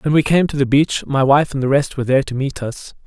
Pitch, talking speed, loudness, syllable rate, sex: 140 Hz, 315 wpm, -17 LUFS, 6.1 syllables/s, male